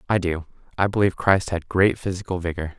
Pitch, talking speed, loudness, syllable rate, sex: 90 Hz, 170 wpm, -22 LUFS, 6.1 syllables/s, male